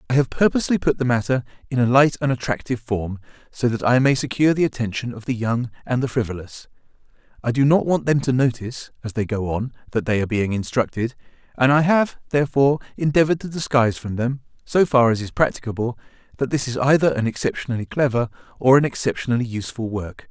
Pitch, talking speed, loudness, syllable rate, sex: 125 Hz, 200 wpm, -21 LUFS, 6.5 syllables/s, male